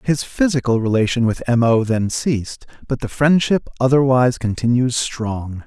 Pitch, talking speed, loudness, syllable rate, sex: 125 Hz, 150 wpm, -18 LUFS, 4.8 syllables/s, male